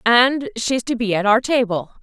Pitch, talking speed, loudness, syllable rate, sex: 240 Hz, 210 wpm, -18 LUFS, 4.4 syllables/s, female